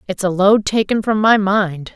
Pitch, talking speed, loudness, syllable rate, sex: 200 Hz, 215 wpm, -15 LUFS, 4.5 syllables/s, female